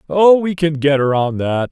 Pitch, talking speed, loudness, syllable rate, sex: 155 Hz, 210 wpm, -15 LUFS, 4.6 syllables/s, male